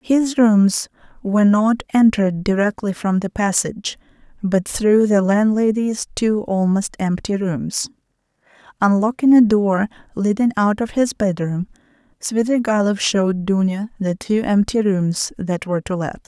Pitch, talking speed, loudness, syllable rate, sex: 205 Hz, 135 wpm, -18 LUFS, 4.4 syllables/s, female